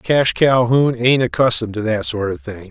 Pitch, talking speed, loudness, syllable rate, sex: 120 Hz, 200 wpm, -16 LUFS, 4.9 syllables/s, male